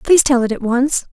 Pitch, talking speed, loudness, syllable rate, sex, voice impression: 255 Hz, 260 wpm, -15 LUFS, 6.1 syllables/s, female, feminine, adult-like, slightly powerful, fluent, intellectual, slightly sharp